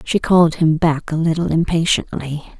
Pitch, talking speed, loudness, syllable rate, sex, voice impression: 160 Hz, 160 wpm, -17 LUFS, 4.9 syllables/s, female, feminine, slightly old, slightly soft, sincere, calm, slightly reassuring, slightly elegant